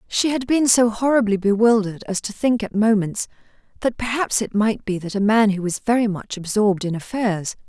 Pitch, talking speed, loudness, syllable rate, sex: 215 Hz, 205 wpm, -20 LUFS, 5.4 syllables/s, female